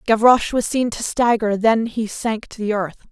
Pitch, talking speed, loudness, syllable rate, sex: 220 Hz, 210 wpm, -19 LUFS, 4.9 syllables/s, female